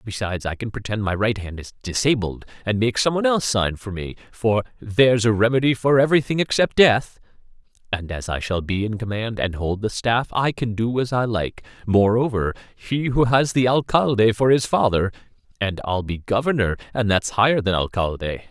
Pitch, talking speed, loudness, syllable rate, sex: 110 Hz, 195 wpm, -21 LUFS, 5.3 syllables/s, male